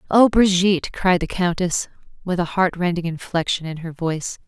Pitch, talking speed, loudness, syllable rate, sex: 175 Hz, 175 wpm, -20 LUFS, 5.2 syllables/s, female